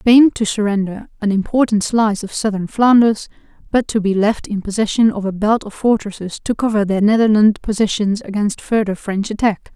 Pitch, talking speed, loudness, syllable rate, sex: 210 Hz, 180 wpm, -16 LUFS, 5.3 syllables/s, female